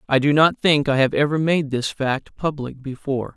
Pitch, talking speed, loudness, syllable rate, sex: 145 Hz, 215 wpm, -20 LUFS, 5.1 syllables/s, male